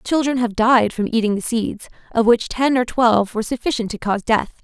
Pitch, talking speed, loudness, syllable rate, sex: 235 Hz, 220 wpm, -19 LUFS, 5.6 syllables/s, female